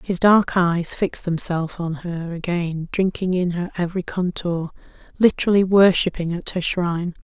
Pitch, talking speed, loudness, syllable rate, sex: 175 Hz, 150 wpm, -21 LUFS, 5.0 syllables/s, female